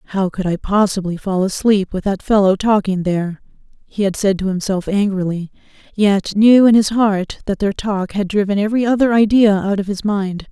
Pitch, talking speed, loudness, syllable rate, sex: 200 Hz, 195 wpm, -16 LUFS, 5.2 syllables/s, female